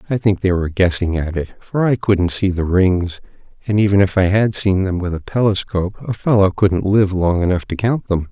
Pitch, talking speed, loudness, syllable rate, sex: 95 Hz, 230 wpm, -17 LUFS, 5.3 syllables/s, male